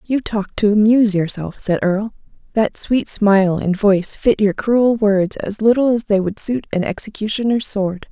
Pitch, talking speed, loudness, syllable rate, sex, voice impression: 210 Hz, 185 wpm, -17 LUFS, 4.8 syllables/s, female, feminine, adult-like, relaxed, slightly bright, soft, slightly raspy, slightly intellectual, calm, friendly, reassuring, elegant, kind, modest